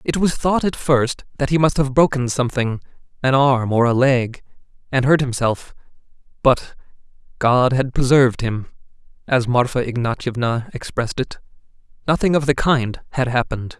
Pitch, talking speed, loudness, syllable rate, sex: 130 Hz, 140 wpm, -19 LUFS, 5.1 syllables/s, male